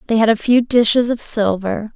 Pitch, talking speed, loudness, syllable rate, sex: 225 Hz, 215 wpm, -16 LUFS, 5.1 syllables/s, female